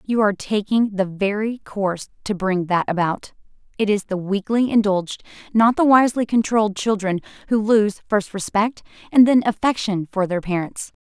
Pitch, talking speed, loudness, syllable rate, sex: 205 Hz, 165 wpm, -20 LUFS, 5.1 syllables/s, female